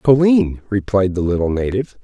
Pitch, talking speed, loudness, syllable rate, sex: 105 Hz, 145 wpm, -17 LUFS, 5.8 syllables/s, male